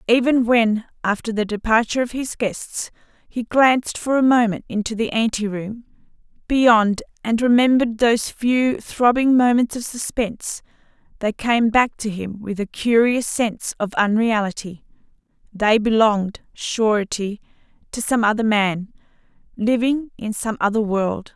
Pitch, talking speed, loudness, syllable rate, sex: 225 Hz, 130 wpm, -19 LUFS, 4.5 syllables/s, female